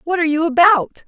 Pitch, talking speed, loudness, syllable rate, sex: 325 Hz, 225 wpm, -15 LUFS, 6.2 syllables/s, female